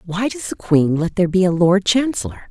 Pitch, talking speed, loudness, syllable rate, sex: 185 Hz, 240 wpm, -17 LUFS, 5.6 syllables/s, female